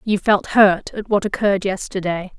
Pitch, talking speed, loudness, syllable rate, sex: 195 Hz, 175 wpm, -18 LUFS, 4.9 syllables/s, female